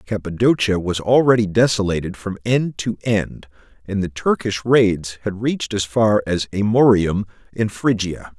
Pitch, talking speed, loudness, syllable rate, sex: 105 Hz, 145 wpm, -19 LUFS, 4.5 syllables/s, male